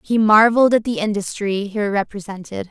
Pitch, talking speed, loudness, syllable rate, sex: 210 Hz, 155 wpm, -17 LUFS, 5.8 syllables/s, female